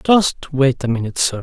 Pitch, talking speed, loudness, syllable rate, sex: 140 Hz, 210 wpm, -17 LUFS, 5.0 syllables/s, male